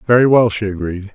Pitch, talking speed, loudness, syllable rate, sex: 105 Hz, 210 wpm, -15 LUFS, 5.9 syllables/s, male